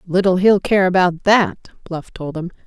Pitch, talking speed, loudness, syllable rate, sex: 180 Hz, 180 wpm, -16 LUFS, 4.7 syllables/s, female